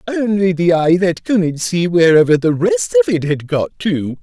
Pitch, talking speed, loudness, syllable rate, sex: 165 Hz, 200 wpm, -15 LUFS, 4.3 syllables/s, male